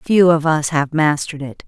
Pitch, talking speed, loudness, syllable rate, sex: 155 Hz, 215 wpm, -16 LUFS, 5.0 syllables/s, female